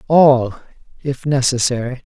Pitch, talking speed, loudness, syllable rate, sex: 130 Hz, 85 wpm, -16 LUFS, 4.0 syllables/s, male